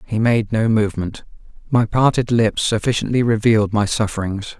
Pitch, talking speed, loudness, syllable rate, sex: 110 Hz, 145 wpm, -18 LUFS, 5.2 syllables/s, male